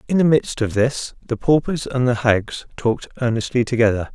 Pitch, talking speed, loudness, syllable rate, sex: 120 Hz, 190 wpm, -19 LUFS, 5.2 syllables/s, male